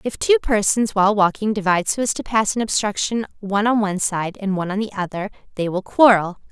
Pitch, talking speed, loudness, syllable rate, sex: 205 Hz, 220 wpm, -19 LUFS, 6.2 syllables/s, female